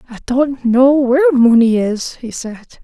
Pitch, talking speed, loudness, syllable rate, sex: 250 Hz, 170 wpm, -13 LUFS, 4.3 syllables/s, female